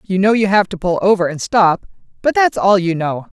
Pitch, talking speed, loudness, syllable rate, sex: 190 Hz, 250 wpm, -15 LUFS, 5.3 syllables/s, female